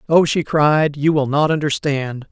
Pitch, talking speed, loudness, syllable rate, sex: 150 Hz, 180 wpm, -17 LUFS, 4.2 syllables/s, male